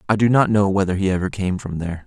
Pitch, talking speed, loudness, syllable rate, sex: 100 Hz, 290 wpm, -19 LUFS, 6.9 syllables/s, male